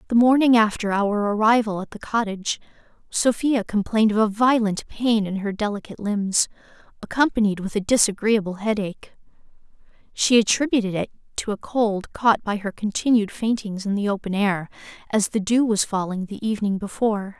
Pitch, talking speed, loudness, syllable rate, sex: 210 Hz, 160 wpm, -22 LUFS, 5.4 syllables/s, female